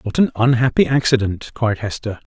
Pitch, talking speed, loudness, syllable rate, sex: 115 Hz, 155 wpm, -18 LUFS, 5.2 syllables/s, male